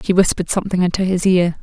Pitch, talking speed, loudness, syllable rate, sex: 180 Hz, 220 wpm, -17 LUFS, 7.3 syllables/s, female